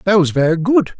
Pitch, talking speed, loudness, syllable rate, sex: 185 Hz, 240 wpm, -15 LUFS, 6.2 syllables/s, male